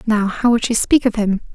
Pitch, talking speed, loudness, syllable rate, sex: 220 Hz, 270 wpm, -17 LUFS, 5.3 syllables/s, female